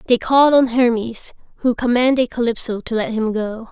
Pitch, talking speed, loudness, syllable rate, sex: 235 Hz, 180 wpm, -17 LUFS, 5.3 syllables/s, female